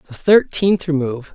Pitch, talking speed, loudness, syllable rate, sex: 160 Hz, 135 wpm, -16 LUFS, 5.1 syllables/s, male